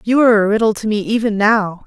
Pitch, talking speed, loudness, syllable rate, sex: 215 Hz, 260 wpm, -15 LUFS, 6.2 syllables/s, female